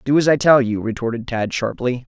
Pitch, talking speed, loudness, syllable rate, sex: 125 Hz, 225 wpm, -18 LUFS, 5.6 syllables/s, male